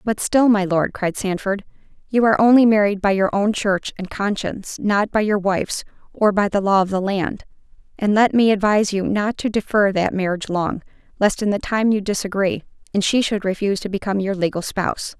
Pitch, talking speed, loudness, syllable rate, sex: 200 Hz, 210 wpm, -19 LUFS, 5.6 syllables/s, female